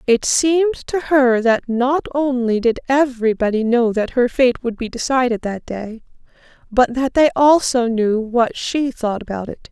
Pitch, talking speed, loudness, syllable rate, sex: 245 Hz, 175 wpm, -17 LUFS, 4.4 syllables/s, female